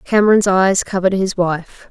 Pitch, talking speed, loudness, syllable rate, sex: 190 Hz, 160 wpm, -15 LUFS, 5.0 syllables/s, female